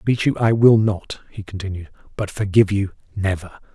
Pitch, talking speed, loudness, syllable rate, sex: 100 Hz, 160 wpm, -19 LUFS, 5.6 syllables/s, male